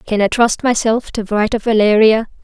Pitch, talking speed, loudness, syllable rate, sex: 220 Hz, 195 wpm, -14 LUFS, 5.5 syllables/s, female